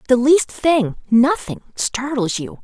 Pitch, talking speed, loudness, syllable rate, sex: 250 Hz, 90 wpm, -17 LUFS, 3.7 syllables/s, female